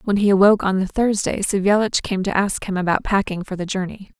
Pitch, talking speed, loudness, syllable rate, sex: 195 Hz, 230 wpm, -19 LUFS, 6.0 syllables/s, female